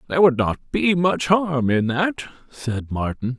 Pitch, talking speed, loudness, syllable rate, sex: 145 Hz, 175 wpm, -20 LUFS, 4.1 syllables/s, male